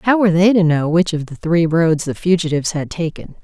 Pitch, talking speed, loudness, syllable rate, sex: 170 Hz, 245 wpm, -16 LUFS, 5.7 syllables/s, female